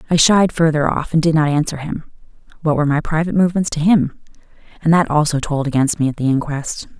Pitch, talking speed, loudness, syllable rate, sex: 155 Hz, 195 wpm, -17 LUFS, 6.3 syllables/s, female